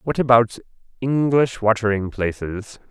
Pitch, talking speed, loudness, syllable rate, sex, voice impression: 115 Hz, 85 wpm, -20 LUFS, 4.4 syllables/s, male, very masculine, slightly old, slightly thick, slightly muffled, calm, mature, elegant, slightly sweet